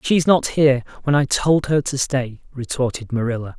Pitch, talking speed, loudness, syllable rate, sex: 135 Hz, 185 wpm, -19 LUFS, 5.1 syllables/s, male